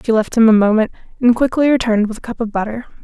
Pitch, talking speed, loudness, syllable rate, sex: 230 Hz, 255 wpm, -15 LUFS, 7.2 syllables/s, female